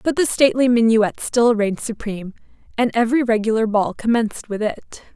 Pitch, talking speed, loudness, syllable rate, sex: 225 Hz, 165 wpm, -18 LUFS, 5.8 syllables/s, female